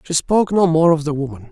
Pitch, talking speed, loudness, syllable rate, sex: 160 Hz, 280 wpm, -16 LUFS, 6.7 syllables/s, male